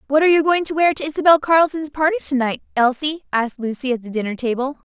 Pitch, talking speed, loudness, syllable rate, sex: 285 Hz, 230 wpm, -18 LUFS, 6.9 syllables/s, female